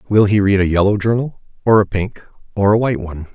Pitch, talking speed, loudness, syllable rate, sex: 100 Hz, 235 wpm, -16 LUFS, 6.6 syllables/s, male